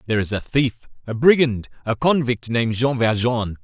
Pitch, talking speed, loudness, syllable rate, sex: 120 Hz, 180 wpm, -20 LUFS, 5.4 syllables/s, male